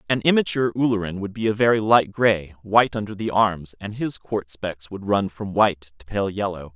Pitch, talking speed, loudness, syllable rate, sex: 105 Hz, 215 wpm, -22 LUFS, 5.3 syllables/s, male